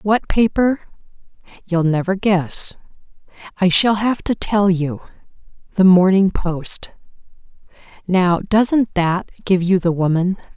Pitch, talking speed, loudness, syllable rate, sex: 190 Hz, 115 wpm, -17 LUFS, 3.7 syllables/s, female